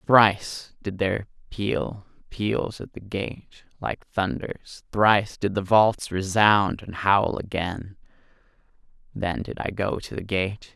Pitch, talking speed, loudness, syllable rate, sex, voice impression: 100 Hz, 140 wpm, -24 LUFS, 3.6 syllables/s, male, masculine, middle-aged, weak, dark, muffled, halting, raspy, calm, slightly mature, slightly kind, modest